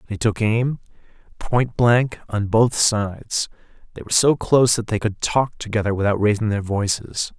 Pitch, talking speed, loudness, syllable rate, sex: 110 Hz, 170 wpm, -20 LUFS, 4.9 syllables/s, male